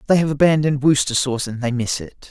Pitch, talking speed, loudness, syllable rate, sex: 135 Hz, 235 wpm, -18 LUFS, 7.0 syllables/s, male